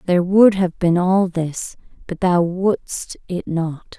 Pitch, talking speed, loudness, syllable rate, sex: 180 Hz, 150 wpm, -18 LUFS, 3.8 syllables/s, female